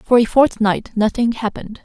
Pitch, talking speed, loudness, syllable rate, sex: 230 Hz, 165 wpm, -17 LUFS, 5.2 syllables/s, female